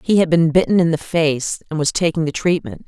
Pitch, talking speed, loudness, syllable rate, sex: 160 Hz, 250 wpm, -17 LUFS, 5.6 syllables/s, female